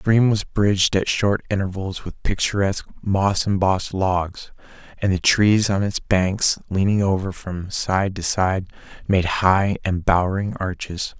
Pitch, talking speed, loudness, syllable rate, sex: 95 Hz, 150 wpm, -21 LUFS, 4.2 syllables/s, male